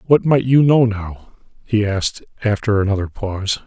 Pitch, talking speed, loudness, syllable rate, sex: 110 Hz, 165 wpm, -17 LUFS, 4.8 syllables/s, male